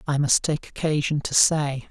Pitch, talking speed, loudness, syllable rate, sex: 145 Hz, 190 wpm, -22 LUFS, 4.6 syllables/s, male